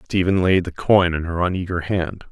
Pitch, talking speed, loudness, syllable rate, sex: 90 Hz, 210 wpm, -20 LUFS, 5.1 syllables/s, male